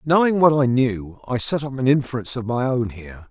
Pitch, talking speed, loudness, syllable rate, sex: 125 Hz, 235 wpm, -20 LUFS, 5.8 syllables/s, male